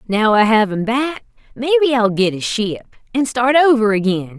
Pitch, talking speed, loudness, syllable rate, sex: 230 Hz, 190 wpm, -16 LUFS, 5.2 syllables/s, female